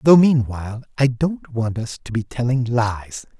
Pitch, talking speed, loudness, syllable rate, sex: 120 Hz, 175 wpm, -20 LUFS, 4.4 syllables/s, male